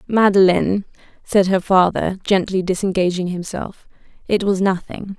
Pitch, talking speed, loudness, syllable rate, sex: 190 Hz, 115 wpm, -18 LUFS, 4.8 syllables/s, female